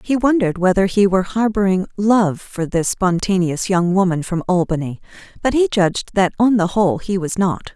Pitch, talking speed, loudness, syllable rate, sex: 190 Hz, 185 wpm, -17 LUFS, 5.3 syllables/s, female